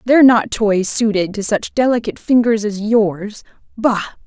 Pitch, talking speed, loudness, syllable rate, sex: 215 Hz, 155 wpm, -16 LUFS, 4.7 syllables/s, female